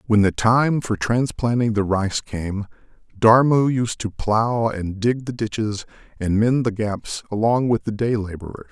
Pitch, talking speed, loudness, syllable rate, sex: 110 Hz, 170 wpm, -21 LUFS, 4.2 syllables/s, male